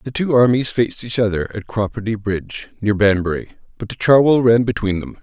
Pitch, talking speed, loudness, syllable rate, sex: 110 Hz, 195 wpm, -17 LUFS, 5.7 syllables/s, male